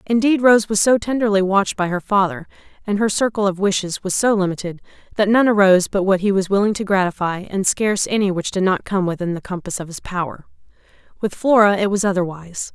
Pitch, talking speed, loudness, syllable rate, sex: 195 Hz, 210 wpm, -18 LUFS, 6.1 syllables/s, female